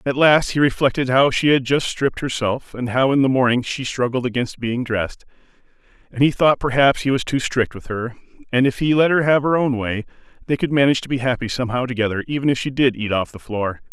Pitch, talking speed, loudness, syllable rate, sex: 130 Hz, 235 wpm, -19 LUFS, 6.0 syllables/s, male